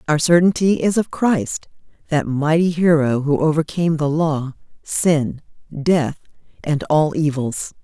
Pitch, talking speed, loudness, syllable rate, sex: 155 Hz, 130 wpm, -18 LUFS, 4.1 syllables/s, female